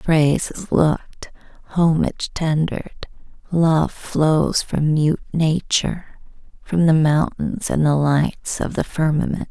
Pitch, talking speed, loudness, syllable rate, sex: 155 Hz, 120 wpm, -19 LUFS, 3.7 syllables/s, female